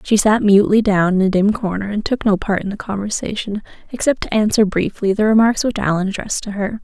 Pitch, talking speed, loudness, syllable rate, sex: 205 Hz, 230 wpm, -17 LUFS, 6.1 syllables/s, female